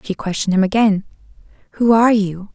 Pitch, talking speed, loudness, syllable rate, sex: 205 Hz, 165 wpm, -16 LUFS, 6.4 syllables/s, female